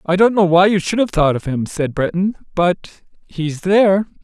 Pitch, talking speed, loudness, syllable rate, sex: 180 Hz, 200 wpm, -16 LUFS, 4.8 syllables/s, male